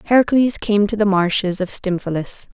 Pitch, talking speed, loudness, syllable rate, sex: 200 Hz, 160 wpm, -18 LUFS, 5.2 syllables/s, female